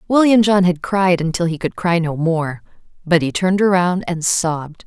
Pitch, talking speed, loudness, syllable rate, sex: 175 Hz, 195 wpm, -17 LUFS, 4.9 syllables/s, female